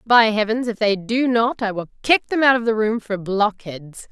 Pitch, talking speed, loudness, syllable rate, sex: 220 Hz, 235 wpm, -19 LUFS, 4.8 syllables/s, female